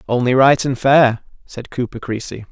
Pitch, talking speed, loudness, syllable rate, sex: 125 Hz, 165 wpm, -16 LUFS, 4.7 syllables/s, male